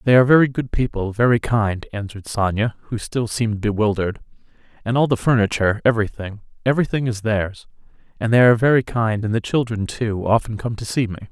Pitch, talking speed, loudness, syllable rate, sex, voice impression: 115 Hz, 185 wpm, -20 LUFS, 6.2 syllables/s, male, very masculine, middle-aged, very thick, tensed, slightly powerful, slightly bright, soft, muffled, fluent, slightly raspy, cool, very intellectual, slightly refreshing, sincere, calm, very mature, very friendly, reassuring, unique, elegant, very wild, very sweet, lively, kind, intense